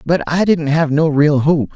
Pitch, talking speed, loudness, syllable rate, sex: 155 Hz, 240 wpm, -14 LUFS, 4.4 syllables/s, male